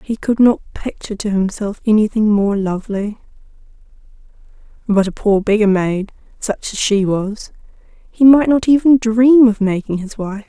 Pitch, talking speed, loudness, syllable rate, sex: 215 Hz, 155 wpm, -15 LUFS, 4.7 syllables/s, female